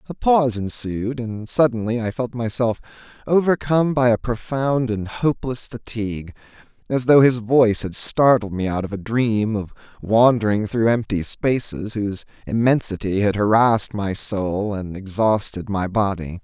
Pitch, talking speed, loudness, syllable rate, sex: 115 Hz, 150 wpm, -20 LUFS, 4.7 syllables/s, male